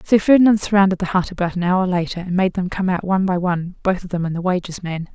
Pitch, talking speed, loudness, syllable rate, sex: 185 Hz, 270 wpm, -19 LUFS, 6.7 syllables/s, female